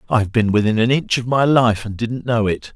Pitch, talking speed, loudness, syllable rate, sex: 115 Hz, 285 wpm, -17 LUFS, 5.5 syllables/s, male